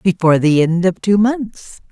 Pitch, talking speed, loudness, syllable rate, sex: 190 Hz, 190 wpm, -14 LUFS, 4.4 syllables/s, female